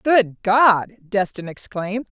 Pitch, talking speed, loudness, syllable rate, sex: 205 Hz, 110 wpm, -19 LUFS, 3.7 syllables/s, female